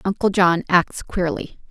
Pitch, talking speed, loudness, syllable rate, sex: 180 Hz, 140 wpm, -19 LUFS, 4.1 syllables/s, female